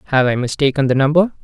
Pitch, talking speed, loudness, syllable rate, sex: 145 Hz, 210 wpm, -16 LUFS, 7.1 syllables/s, male